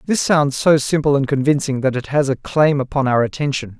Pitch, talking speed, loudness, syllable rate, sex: 140 Hz, 220 wpm, -17 LUFS, 5.5 syllables/s, male